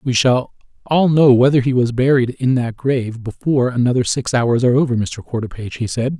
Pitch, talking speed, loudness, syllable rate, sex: 125 Hz, 205 wpm, -17 LUFS, 5.6 syllables/s, male